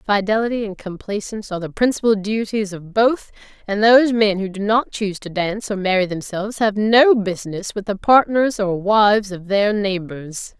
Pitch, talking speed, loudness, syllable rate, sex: 205 Hz, 180 wpm, -18 LUFS, 5.2 syllables/s, female